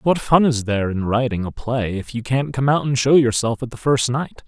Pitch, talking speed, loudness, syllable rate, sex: 125 Hz, 270 wpm, -19 LUFS, 5.2 syllables/s, male